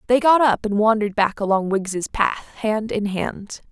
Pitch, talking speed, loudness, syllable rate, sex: 215 Hz, 195 wpm, -20 LUFS, 4.6 syllables/s, female